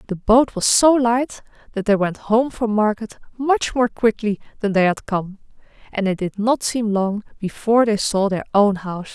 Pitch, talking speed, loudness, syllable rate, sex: 215 Hz, 195 wpm, -19 LUFS, 4.7 syllables/s, female